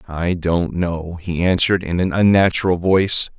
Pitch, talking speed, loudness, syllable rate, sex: 90 Hz, 160 wpm, -18 LUFS, 4.8 syllables/s, male